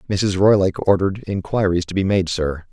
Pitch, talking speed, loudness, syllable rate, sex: 95 Hz, 175 wpm, -19 LUFS, 5.7 syllables/s, male